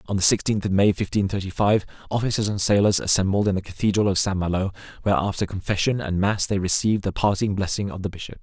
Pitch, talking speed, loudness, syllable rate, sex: 100 Hz, 220 wpm, -22 LUFS, 6.6 syllables/s, male